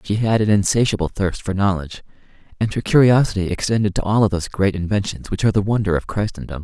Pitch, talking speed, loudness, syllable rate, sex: 100 Hz, 210 wpm, -19 LUFS, 6.7 syllables/s, male